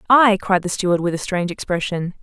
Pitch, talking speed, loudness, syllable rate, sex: 190 Hz, 215 wpm, -19 LUFS, 6.1 syllables/s, female